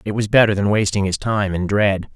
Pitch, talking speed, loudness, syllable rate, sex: 100 Hz, 250 wpm, -18 LUFS, 5.5 syllables/s, male